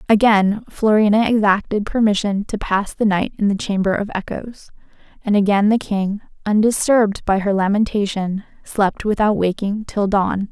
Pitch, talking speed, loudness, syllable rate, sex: 205 Hz, 150 wpm, -18 LUFS, 4.8 syllables/s, female